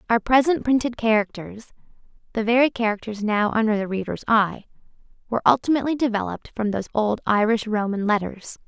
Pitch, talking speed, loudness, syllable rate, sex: 220 Hz, 130 wpm, -22 LUFS, 6.1 syllables/s, female